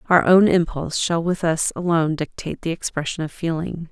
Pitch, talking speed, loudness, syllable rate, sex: 165 Hz, 185 wpm, -21 LUFS, 5.6 syllables/s, female